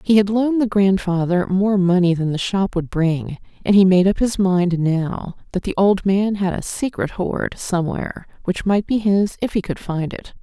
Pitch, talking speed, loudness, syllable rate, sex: 190 Hz, 215 wpm, -19 LUFS, 4.7 syllables/s, female